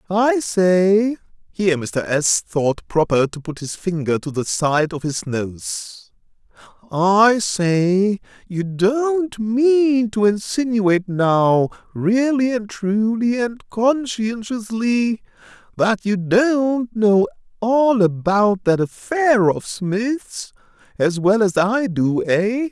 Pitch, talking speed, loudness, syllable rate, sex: 205 Hz, 115 wpm, -19 LUFS, 3.9 syllables/s, male